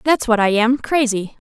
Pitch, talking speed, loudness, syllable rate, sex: 235 Hz, 205 wpm, -17 LUFS, 4.7 syllables/s, female